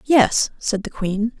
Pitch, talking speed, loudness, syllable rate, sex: 225 Hz, 170 wpm, -20 LUFS, 3.3 syllables/s, female